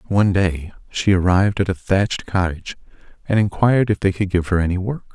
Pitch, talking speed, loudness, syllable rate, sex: 95 Hz, 200 wpm, -19 LUFS, 6.1 syllables/s, male